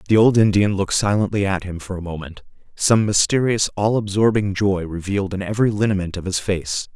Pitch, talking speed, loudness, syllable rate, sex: 100 Hz, 190 wpm, -19 LUFS, 5.8 syllables/s, male